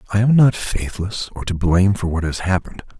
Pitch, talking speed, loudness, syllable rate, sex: 95 Hz, 220 wpm, -19 LUFS, 5.8 syllables/s, male